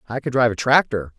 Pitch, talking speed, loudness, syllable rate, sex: 120 Hz, 255 wpm, -19 LUFS, 7.1 syllables/s, male